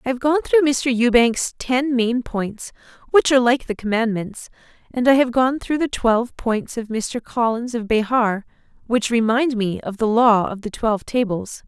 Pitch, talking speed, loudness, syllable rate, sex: 235 Hz, 190 wpm, -19 LUFS, 4.6 syllables/s, female